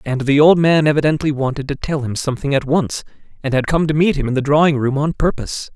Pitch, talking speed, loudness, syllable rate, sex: 145 Hz, 250 wpm, -16 LUFS, 6.3 syllables/s, male